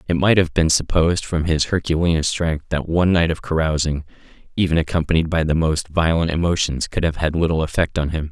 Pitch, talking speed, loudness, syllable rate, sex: 80 Hz, 200 wpm, -19 LUFS, 5.8 syllables/s, male